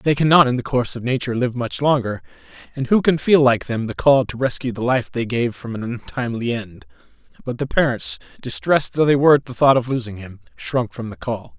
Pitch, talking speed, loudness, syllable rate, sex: 125 Hz, 235 wpm, -19 LUFS, 5.9 syllables/s, male